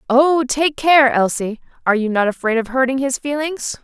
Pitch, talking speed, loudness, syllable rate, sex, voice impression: 260 Hz, 190 wpm, -17 LUFS, 5.1 syllables/s, female, very feminine, very young, very thin, very tensed, very powerful, very bright, hard, very clear, very fluent, slightly raspy, very cute, slightly intellectual, very refreshing, sincere, slightly calm, very friendly, very reassuring, very unique, slightly elegant, wild, sweet, very lively, very intense, sharp, very light